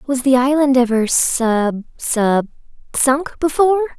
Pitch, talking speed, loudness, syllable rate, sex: 260 Hz, 120 wpm, -16 LUFS, 4.0 syllables/s, female